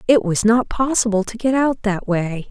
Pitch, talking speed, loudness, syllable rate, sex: 220 Hz, 215 wpm, -18 LUFS, 4.7 syllables/s, female